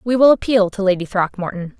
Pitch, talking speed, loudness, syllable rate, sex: 205 Hz, 200 wpm, -17 LUFS, 5.9 syllables/s, female